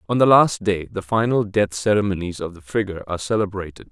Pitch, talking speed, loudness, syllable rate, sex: 100 Hz, 200 wpm, -20 LUFS, 6.3 syllables/s, male